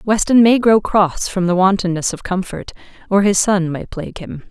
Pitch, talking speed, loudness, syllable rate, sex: 195 Hz, 200 wpm, -15 LUFS, 5.0 syllables/s, female